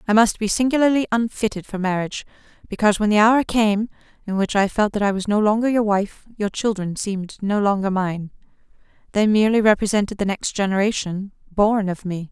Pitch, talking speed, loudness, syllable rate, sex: 205 Hz, 180 wpm, -20 LUFS, 5.8 syllables/s, female